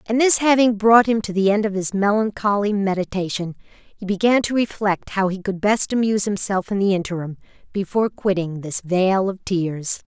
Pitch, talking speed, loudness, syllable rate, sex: 200 Hz, 185 wpm, -20 LUFS, 5.1 syllables/s, female